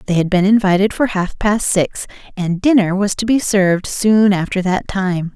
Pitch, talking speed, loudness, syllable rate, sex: 195 Hz, 200 wpm, -15 LUFS, 4.7 syllables/s, female